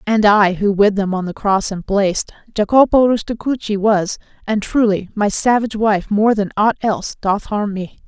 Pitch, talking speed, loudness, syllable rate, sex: 210 Hz, 185 wpm, -16 LUFS, 4.9 syllables/s, female